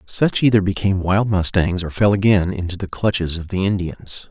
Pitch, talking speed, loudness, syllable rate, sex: 95 Hz, 195 wpm, -19 LUFS, 5.3 syllables/s, male